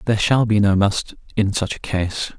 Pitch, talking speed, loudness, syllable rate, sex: 100 Hz, 225 wpm, -19 LUFS, 4.9 syllables/s, male